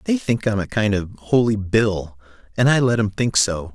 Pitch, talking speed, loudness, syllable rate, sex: 105 Hz, 225 wpm, -20 LUFS, 4.8 syllables/s, male